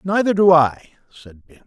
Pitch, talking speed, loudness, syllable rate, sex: 165 Hz, 180 wpm, -15 LUFS, 6.4 syllables/s, male